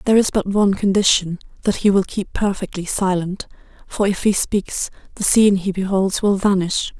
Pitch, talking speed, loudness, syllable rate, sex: 195 Hz, 180 wpm, -18 LUFS, 5.2 syllables/s, female